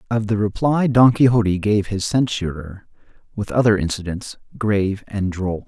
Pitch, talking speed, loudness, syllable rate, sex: 105 Hz, 150 wpm, -19 LUFS, 4.8 syllables/s, male